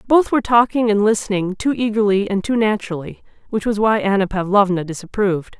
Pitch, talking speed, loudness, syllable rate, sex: 205 Hz, 170 wpm, -18 LUFS, 6.0 syllables/s, female